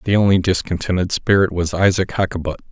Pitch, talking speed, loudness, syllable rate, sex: 90 Hz, 155 wpm, -18 LUFS, 6.1 syllables/s, male